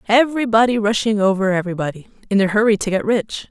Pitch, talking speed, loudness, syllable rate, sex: 210 Hz, 170 wpm, -17 LUFS, 6.7 syllables/s, female